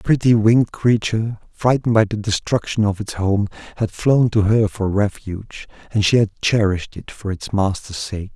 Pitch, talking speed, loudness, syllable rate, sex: 105 Hz, 185 wpm, -19 LUFS, 5.2 syllables/s, male